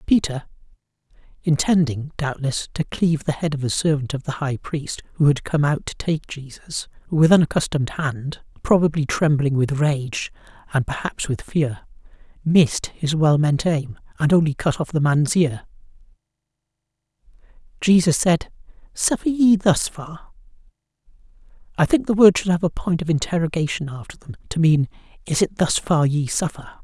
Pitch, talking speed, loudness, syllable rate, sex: 155 Hz, 155 wpm, -20 LUFS, 4.9 syllables/s, male